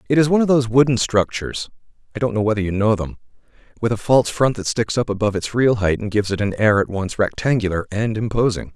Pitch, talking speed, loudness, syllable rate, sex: 110 Hz, 225 wpm, -19 LUFS, 6.8 syllables/s, male